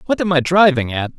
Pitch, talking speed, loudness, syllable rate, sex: 155 Hz, 255 wpm, -15 LUFS, 6.1 syllables/s, male